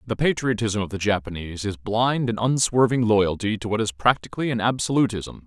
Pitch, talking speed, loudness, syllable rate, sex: 110 Hz, 175 wpm, -23 LUFS, 5.7 syllables/s, male